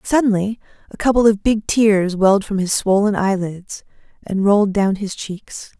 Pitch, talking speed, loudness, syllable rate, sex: 200 Hz, 165 wpm, -17 LUFS, 4.6 syllables/s, female